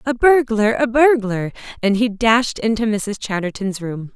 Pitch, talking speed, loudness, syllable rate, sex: 220 Hz, 145 wpm, -18 LUFS, 4.3 syllables/s, female